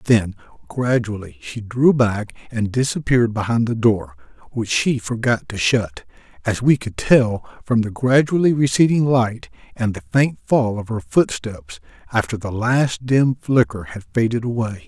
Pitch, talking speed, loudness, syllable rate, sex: 115 Hz, 155 wpm, -19 LUFS, 4.4 syllables/s, male